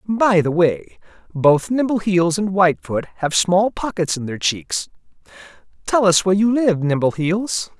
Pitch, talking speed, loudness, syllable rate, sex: 180 Hz, 145 wpm, -18 LUFS, 4.3 syllables/s, male